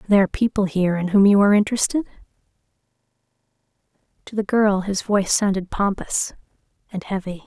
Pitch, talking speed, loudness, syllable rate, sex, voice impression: 200 Hz, 145 wpm, -20 LUFS, 6.6 syllables/s, female, very feminine, slightly young, adult-like, thin, slightly relaxed, slightly weak, slightly bright, very hard, very clear, fluent, cute, intellectual, refreshing, very sincere, very calm, friendly, very reassuring, unique, elegant, very sweet, slightly lively, kind, slightly strict, slightly intense, slightly sharp, light